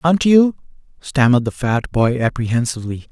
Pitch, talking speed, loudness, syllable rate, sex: 130 Hz, 135 wpm, -17 LUFS, 6.0 syllables/s, male